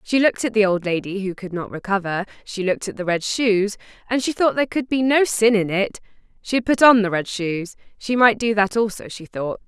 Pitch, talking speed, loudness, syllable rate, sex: 210 Hz, 240 wpm, -20 LUFS, 5.5 syllables/s, female